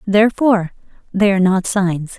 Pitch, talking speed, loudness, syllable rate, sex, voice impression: 195 Hz, 140 wpm, -16 LUFS, 5.4 syllables/s, female, feminine, adult-like, slightly bright, soft, fluent, calm, friendly, reassuring, elegant, kind, slightly modest